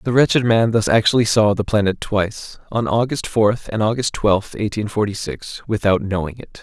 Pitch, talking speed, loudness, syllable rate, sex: 110 Hz, 170 wpm, -18 LUFS, 5.0 syllables/s, male